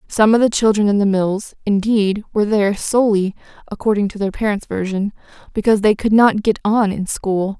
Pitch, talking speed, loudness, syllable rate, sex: 205 Hz, 175 wpm, -17 LUFS, 5.6 syllables/s, female